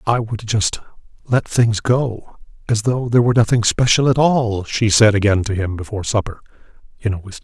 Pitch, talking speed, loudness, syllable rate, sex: 110 Hz, 195 wpm, -17 LUFS, 5.5 syllables/s, male